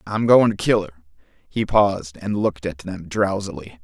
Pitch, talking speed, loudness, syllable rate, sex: 100 Hz, 205 wpm, -20 LUFS, 5.4 syllables/s, male